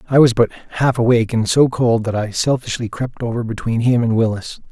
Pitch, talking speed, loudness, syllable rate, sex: 115 Hz, 215 wpm, -17 LUFS, 5.4 syllables/s, male